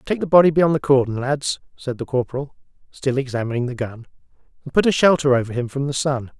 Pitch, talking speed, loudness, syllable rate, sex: 135 Hz, 215 wpm, -20 LUFS, 6.2 syllables/s, male